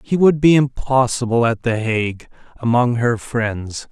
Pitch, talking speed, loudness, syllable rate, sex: 120 Hz, 155 wpm, -17 LUFS, 4.3 syllables/s, male